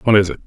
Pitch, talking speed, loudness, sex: 95 Hz, 385 wpm, -16 LUFS, male